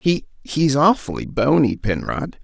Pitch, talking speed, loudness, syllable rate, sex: 150 Hz, 100 wpm, -19 LUFS, 3.8 syllables/s, male